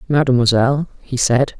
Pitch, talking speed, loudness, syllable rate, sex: 130 Hz, 115 wpm, -16 LUFS, 5.4 syllables/s, female